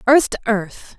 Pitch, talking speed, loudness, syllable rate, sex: 230 Hz, 185 wpm, -18 LUFS, 4.1 syllables/s, female